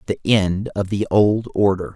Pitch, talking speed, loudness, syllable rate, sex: 100 Hz, 185 wpm, -19 LUFS, 4.1 syllables/s, male